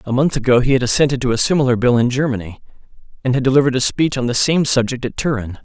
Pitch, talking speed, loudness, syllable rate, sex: 130 Hz, 245 wpm, -16 LUFS, 7.2 syllables/s, male